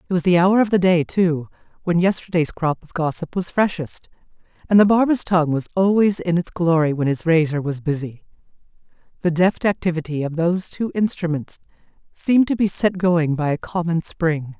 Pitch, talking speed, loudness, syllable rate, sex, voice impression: 170 Hz, 185 wpm, -19 LUFS, 5.3 syllables/s, female, feminine, middle-aged, slightly powerful, clear, fluent, intellectual, calm, elegant, slightly lively, slightly strict, slightly sharp